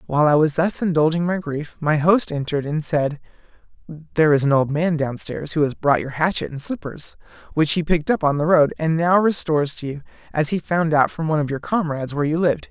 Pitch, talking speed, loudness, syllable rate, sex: 155 Hz, 230 wpm, -20 LUFS, 5.9 syllables/s, male